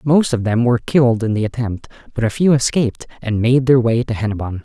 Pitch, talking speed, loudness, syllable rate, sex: 120 Hz, 235 wpm, -17 LUFS, 6.1 syllables/s, male